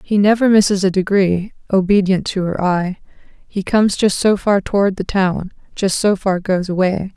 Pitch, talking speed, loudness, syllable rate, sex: 195 Hz, 185 wpm, -16 LUFS, 4.8 syllables/s, female